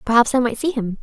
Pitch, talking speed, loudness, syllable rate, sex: 240 Hz, 290 wpm, -19 LUFS, 6.6 syllables/s, female